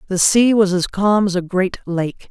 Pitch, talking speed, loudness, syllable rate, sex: 190 Hz, 235 wpm, -17 LUFS, 4.4 syllables/s, female